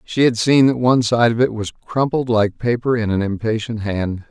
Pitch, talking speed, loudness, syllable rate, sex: 115 Hz, 225 wpm, -18 LUFS, 5.2 syllables/s, male